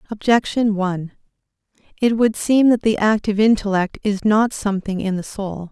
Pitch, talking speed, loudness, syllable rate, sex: 210 Hz, 160 wpm, -18 LUFS, 5.3 syllables/s, female